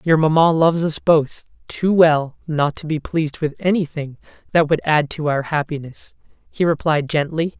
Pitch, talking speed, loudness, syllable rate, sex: 155 Hz, 175 wpm, -18 LUFS, 4.8 syllables/s, female